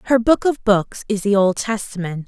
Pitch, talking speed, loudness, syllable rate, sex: 210 Hz, 210 wpm, -18 LUFS, 5.0 syllables/s, female